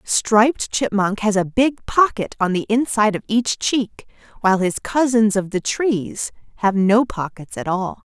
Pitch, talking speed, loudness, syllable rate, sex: 215 Hz, 170 wpm, -19 LUFS, 4.3 syllables/s, female